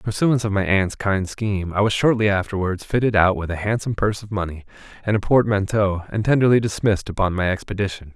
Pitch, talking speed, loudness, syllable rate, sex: 100 Hz, 205 wpm, -20 LUFS, 6.4 syllables/s, male